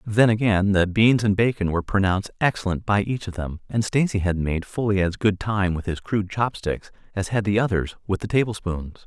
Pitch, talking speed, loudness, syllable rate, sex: 100 Hz, 210 wpm, -23 LUFS, 5.4 syllables/s, male